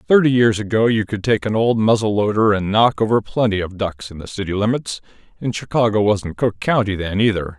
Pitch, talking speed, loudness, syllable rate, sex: 105 Hz, 215 wpm, -18 LUFS, 5.5 syllables/s, male